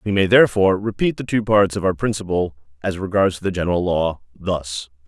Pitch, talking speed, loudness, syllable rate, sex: 95 Hz, 190 wpm, -19 LUFS, 5.6 syllables/s, male